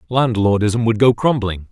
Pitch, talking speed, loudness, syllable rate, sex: 110 Hz, 140 wpm, -16 LUFS, 4.6 syllables/s, male